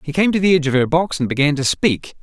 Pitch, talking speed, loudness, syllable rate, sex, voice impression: 155 Hz, 325 wpm, -17 LUFS, 6.7 syllables/s, male, masculine, slightly young, slightly adult-like, slightly thick, slightly tensed, slightly weak, slightly dark, slightly hard, slightly muffled, fluent, slightly cool, slightly intellectual, refreshing, sincere, slightly calm, slightly friendly, slightly reassuring, very unique, wild, slightly sweet, lively, kind, slightly intense, sharp, slightly light